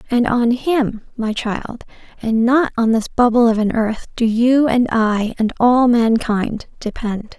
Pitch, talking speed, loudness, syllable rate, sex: 230 Hz, 170 wpm, -17 LUFS, 3.8 syllables/s, female